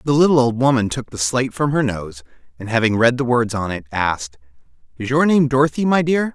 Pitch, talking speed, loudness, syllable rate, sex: 125 Hz, 225 wpm, -18 LUFS, 5.9 syllables/s, male